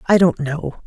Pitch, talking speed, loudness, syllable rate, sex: 160 Hz, 210 wpm, -18 LUFS, 4.0 syllables/s, female